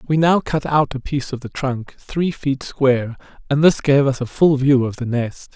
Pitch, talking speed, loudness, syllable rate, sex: 135 Hz, 240 wpm, -19 LUFS, 4.8 syllables/s, male